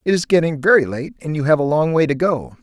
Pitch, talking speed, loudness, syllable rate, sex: 155 Hz, 295 wpm, -17 LUFS, 6.1 syllables/s, male